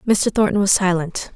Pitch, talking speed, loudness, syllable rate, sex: 195 Hz, 180 wpm, -18 LUFS, 5.0 syllables/s, female